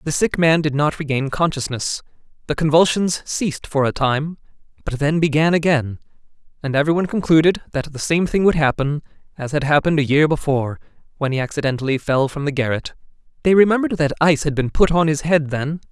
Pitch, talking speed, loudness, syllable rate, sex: 150 Hz, 190 wpm, -19 LUFS, 6.2 syllables/s, male